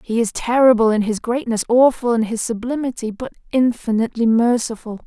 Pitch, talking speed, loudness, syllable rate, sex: 230 Hz, 155 wpm, -18 LUFS, 5.5 syllables/s, female